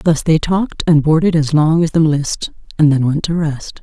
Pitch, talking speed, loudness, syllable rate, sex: 155 Hz, 235 wpm, -14 LUFS, 5.0 syllables/s, female